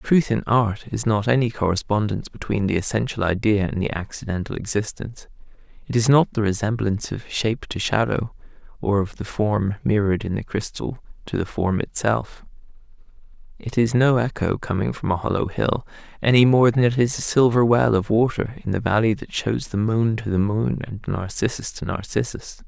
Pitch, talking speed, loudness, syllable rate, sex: 110 Hz, 185 wpm, -22 LUFS, 5.3 syllables/s, male